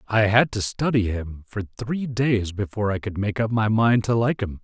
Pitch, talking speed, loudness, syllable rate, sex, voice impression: 110 Hz, 235 wpm, -23 LUFS, 4.9 syllables/s, male, masculine, middle-aged, tensed, slightly powerful, slightly hard, cool, calm, mature, wild, slightly lively, slightly strict